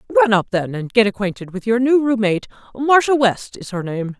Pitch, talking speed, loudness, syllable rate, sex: 220 Hz, 215 wpm, -18 LUFS, 5.4 syllables/s, female